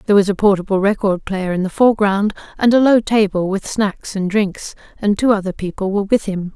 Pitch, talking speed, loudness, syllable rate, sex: 200 Hz, 220 wpm, -17 LUFS, 5.7 syllables/s, female